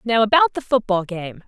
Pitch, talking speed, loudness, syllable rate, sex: 220 Hz, 205 wpm, -18 LUFS, 5.1 syllables/s, female